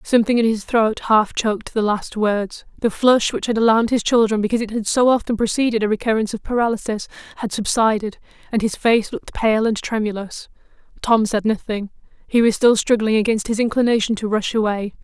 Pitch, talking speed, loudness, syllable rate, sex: 220 Hz, 190 wpm, -19 LUFS, 5.8 syllables/s, female